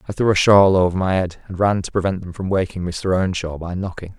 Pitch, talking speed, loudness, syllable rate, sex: 95 Hz, 260 wpm, -19 LUFS, 5.8 syllables/s, male